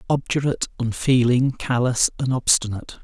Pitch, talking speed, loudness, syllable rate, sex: 125 Hz, 100 wpm, -21 LUFS, 5.4 syllables/s, male